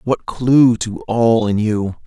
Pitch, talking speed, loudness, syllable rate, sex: 115 Hz, 175 wpm, -16 LUFS, 3.3 syllables/s, male